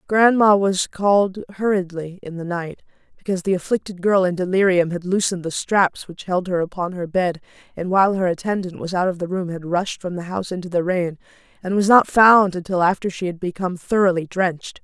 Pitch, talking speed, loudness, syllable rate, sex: 185 Hz, 205 wpm, -20 LUFS, 5.7 syllables/s, female